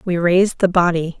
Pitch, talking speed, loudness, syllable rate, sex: 175 Hz, 200 wpm, -16 LUFS, 5.5 syllables/s, female